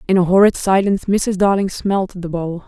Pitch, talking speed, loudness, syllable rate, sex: 190 Hz, 200 wpm, -16 LUFS, 5.3 syllables/s, female